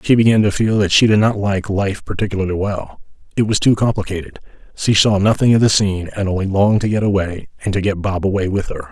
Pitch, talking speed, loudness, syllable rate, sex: 100 Hz, 235 wpm, -16 LUFS, 6.3 syllables/s, male